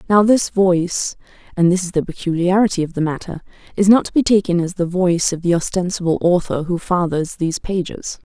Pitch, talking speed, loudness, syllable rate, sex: 180 Hz, 195 wpm, -18 LUFS, 5.7 syllables/s, female